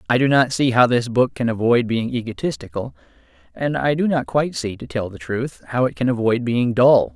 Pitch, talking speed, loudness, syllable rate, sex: 125 Hz, 225 wpm, -19 LUFS, 5.2 syllables/s, male